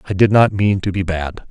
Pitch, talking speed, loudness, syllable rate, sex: 95 Hz, 280 wpm, -16 LUFS, 5.3 syllables/s, male